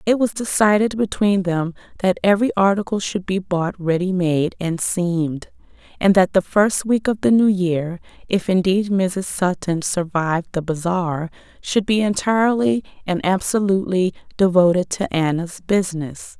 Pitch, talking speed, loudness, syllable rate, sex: 185 Hz, 145 wpm, -19 LUFS, 4.6 syllables/s, female